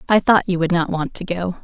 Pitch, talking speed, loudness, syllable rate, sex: 180 Hz, 295 wpm, -19 LUFS, 5.7 syllables/s, female